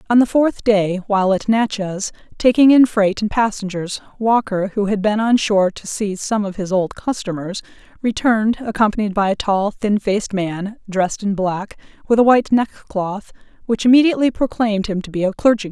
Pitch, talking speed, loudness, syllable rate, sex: 210 Hz, 185 wpm, -18 LUFS, 5.3 syllables/s, female